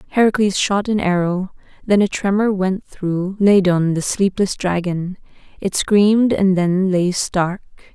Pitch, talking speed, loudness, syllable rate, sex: 190 Hz, 145 wpm, -17 LUFS, 4.1 syllables/s, female